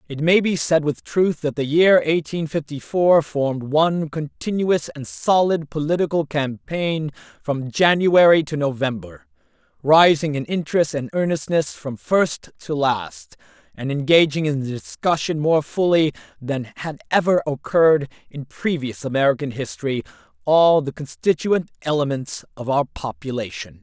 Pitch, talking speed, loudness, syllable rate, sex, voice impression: 150 Hz, 135 wpm, -20 LUFS, 4.5 syllables/s, male, masculine, adult-like, tensed, powerful, slightly hard, clear, raspy, cool, friendly, lively, slightly strict, slightly intense